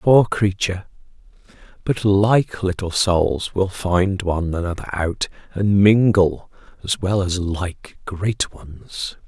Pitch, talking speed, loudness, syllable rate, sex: 95 Hz, 115 wpm, -20 LUFS, 3.5 syllables/s, male